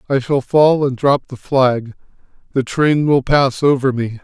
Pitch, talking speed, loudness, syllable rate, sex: 130 Hz, 185 wpm, -15 LUFS, 4.2 syllables/s, male